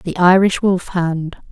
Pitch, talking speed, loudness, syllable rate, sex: 180 Hz, 120 wpm, -16 LUFS, 3.7 syllables/s, female